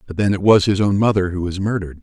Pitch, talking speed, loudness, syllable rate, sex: 95 Hz, 295 wpm, -17 LUFS, 6.9 syllables/s, male